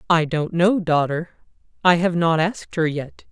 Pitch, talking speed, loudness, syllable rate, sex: 165 Hz, 180 wpm, -20 LUFS, 4.6 syllables/s, female